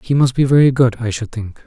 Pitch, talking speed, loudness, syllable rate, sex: 125 Hz, 290 wpm, -15 LUFS, 5.9 syllables/s, male